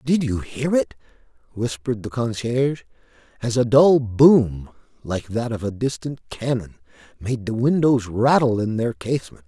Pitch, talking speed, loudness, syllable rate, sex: 125 Hz, 150 wpm, -21 LUFS, 4.6 syllables/s, male